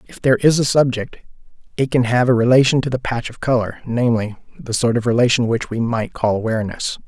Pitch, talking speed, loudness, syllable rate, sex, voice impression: 120 Hz, 210 wpm, -18 LUFS, 6.3 syllables/s, male, masculine, slightly middle-aged, thick, slightly cool, sincere, calm, slightly mature